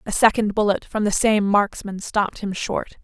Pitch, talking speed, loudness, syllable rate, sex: 205 Hz, 200 wpm, -21 LUFS, 4.9 syllables/s, female